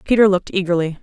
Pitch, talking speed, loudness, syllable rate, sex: 185 Hz, 175 wpm, -17 LUFS, 7.6 syllables/s, female